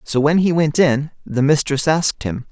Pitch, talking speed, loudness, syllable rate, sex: 150 Hz, 215 wpm, -17 LUFS, 4.8 syllables/s, male